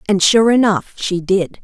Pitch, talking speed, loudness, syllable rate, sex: 195 Hz, 185 wpm, -15 LUFS, 4.3 syllables/s, female